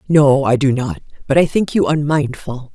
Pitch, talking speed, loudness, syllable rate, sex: 145 Hz, 195 wpm, -16 LUFS, 4.7 syllables/s, female